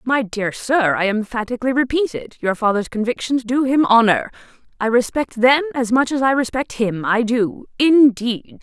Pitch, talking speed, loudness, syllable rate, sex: 245 Hz, 175 wpm, -18 LUFS, 4.8 syllables/s, female